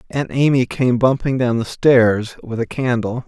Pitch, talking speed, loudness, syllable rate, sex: 125 Hz, 185 wpm, -17 LUFS, 4.4 syllables/s, male